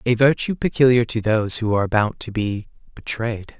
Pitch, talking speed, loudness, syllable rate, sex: 115 Hz, 185 wpm, -20 LUFS, 5.6 syllables/s, male